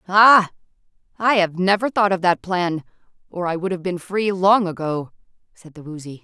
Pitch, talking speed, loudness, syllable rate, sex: 185 Hz, 185 wpm, -19 LUFS, 4.9 syllables/s, female